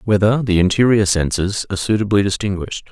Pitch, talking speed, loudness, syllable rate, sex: 100 Hz, 145 wpm, -17 LUFS, 6.2 syllables/s, male